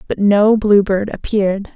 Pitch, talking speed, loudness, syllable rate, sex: 205 Hz, 170 wpm, -15 LUFS, 4.5 syllables/s, female